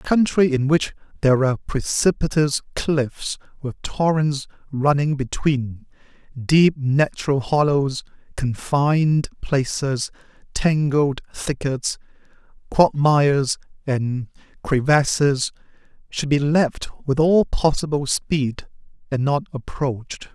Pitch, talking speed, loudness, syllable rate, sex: 140 Hz, 90 wpm, -21 LUFS, 3.6 syllables/s, male